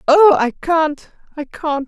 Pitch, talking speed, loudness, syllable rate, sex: 305 Hz, 160 wpm, -15 LUFS, 3.5 syllables/s, female